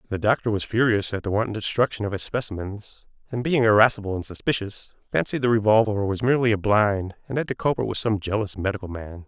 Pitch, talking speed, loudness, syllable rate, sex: 105 Hz, 205 wpm, -23 LUFS, 6.2 syllables/s, male